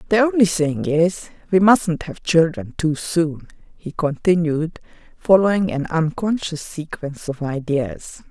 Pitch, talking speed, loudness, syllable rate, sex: 165 Hz, 130 wpm, -19 LUFS, 4.1 syllables/s, female